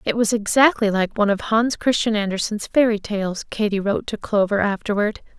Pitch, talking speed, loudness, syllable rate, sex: 215 Hz, 180 wpm, -20 LUFS, 5.5 syllables/s, female